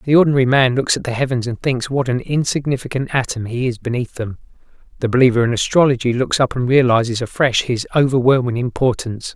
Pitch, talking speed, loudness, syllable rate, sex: 125 Hz, 185 wpm, -17 LUFS, 6.2 syllables/s, male